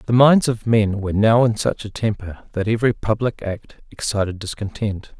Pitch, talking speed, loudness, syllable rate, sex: 110 Hz, 185 wpm, -20 LUFS, 5.0 syllables/s, male